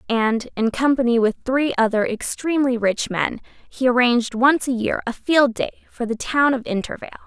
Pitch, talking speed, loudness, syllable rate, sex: 245 Hz, 180 wpm, -20 LUFS, 5.2 syllables/s, female